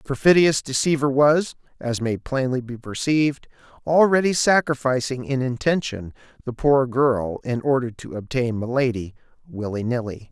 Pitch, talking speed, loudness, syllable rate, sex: 130 Hz, 135 wpm, -21 LUFS, 4.8 syllables/s, male